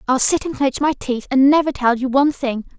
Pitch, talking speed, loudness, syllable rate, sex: 270 Hz, 260 wpm, -17 LUFS, 5.6 syllables/s, female